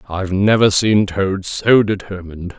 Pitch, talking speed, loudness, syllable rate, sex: 100 Hz, 140 wpm, -15 LUFS, 4.6 syllables/s, male